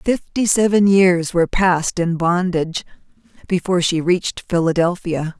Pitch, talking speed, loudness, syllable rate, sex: 180 Hz, 120 wpm, -17 LUFS, 4.9 syllables/s, female